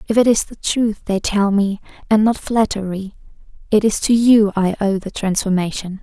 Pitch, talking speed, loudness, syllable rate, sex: 205 Hz, 190 wpm, -17 LUFS, 5.0 syllables/s, female